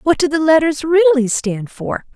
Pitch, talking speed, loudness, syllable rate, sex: 290 Hz, 195 wpm, -15 LUFS, 4.5 syllables/s, female